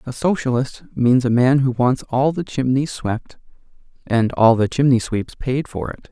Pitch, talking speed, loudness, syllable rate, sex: 125 Hz, 185 wpm, -19 LUFS, 4.4 syllables/s, male